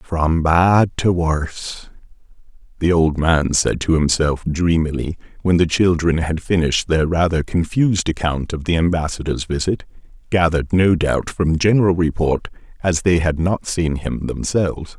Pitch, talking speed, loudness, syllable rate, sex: 85 Hz, 150 wpm, -18 LUFS, 4.5 syllables/s, male